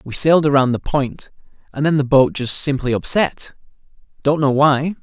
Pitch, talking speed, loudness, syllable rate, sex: 140 Hz, 165 wpm, -17 LUFS, 5.0 syllables/s, male